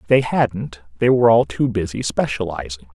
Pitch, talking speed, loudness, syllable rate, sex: 105 Hz, 160 wpm, -19 LUFS, 5.1 syllables/s, male